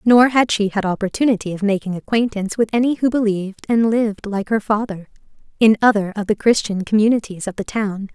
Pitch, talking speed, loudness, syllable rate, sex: 210 Hz, 190 wpm, -18 LUFS, 5.9 syllables/s, female